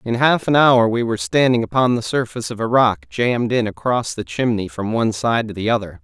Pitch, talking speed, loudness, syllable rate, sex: 115 Hz, 240 wpm, -18 LUFS, 5.8 syllables/s, male